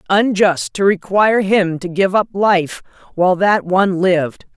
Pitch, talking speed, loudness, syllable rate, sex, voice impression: 185 Hz, 160 wpm, -15 LUFS, 4.6 syllables/s, female, feminine, very adult-like, slightly powerful, intellectual, sharp